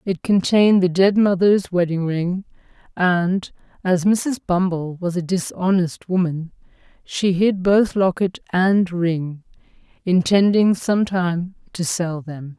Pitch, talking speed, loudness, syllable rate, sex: 180 Hz, 125 wpm, -19 LUFS, 3.9 syllables/s, female